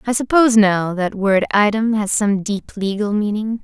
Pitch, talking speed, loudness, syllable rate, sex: 210 Hz, 180 wpm, -17 LUFS, 4.7 syllables/s, female